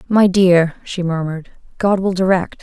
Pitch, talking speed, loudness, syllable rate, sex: 180 Hz, 160 wpm, -16 LUFS, 4.6 syllables/s, female